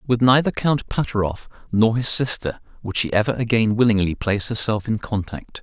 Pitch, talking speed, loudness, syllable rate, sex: 115 Hz, 170 wpm, -20 LUFS, 5.4 syllables/s, male